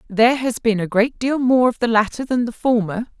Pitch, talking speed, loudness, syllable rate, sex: 235 Hz, 245 wpm, -18 LUFS, 5.4 syllables/s, female